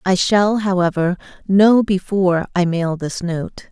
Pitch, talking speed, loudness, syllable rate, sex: 185 Hz, 145 wpm, -17 LUFS, 4.0 syllables/s, female